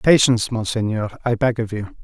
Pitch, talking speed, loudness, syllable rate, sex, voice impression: 115 Hz, 175 wpm, -20 LUFS, 5.5 syllables/s, male, very masculine, very adult-like, old, slightly thick, slightly relaxed, slightly weak, dark, slightly soft, slightly muffled, fluent, slightly raspy, cool, intellectual, sincere, very calm, very mature, friendly, reassuring, unique, very elegant, wild, slightly lively, kind, slightly modest